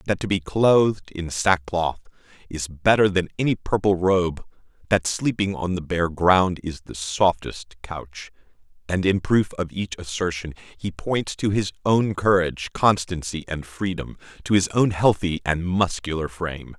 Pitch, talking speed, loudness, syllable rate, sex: 90 Hz, 155 wpm, -22 LUFS, 4.4 syllables/s, male